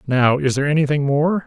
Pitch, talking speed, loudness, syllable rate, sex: 145 Hz, 205 wpm, -18 LUFS, 6.0 syllables/s, male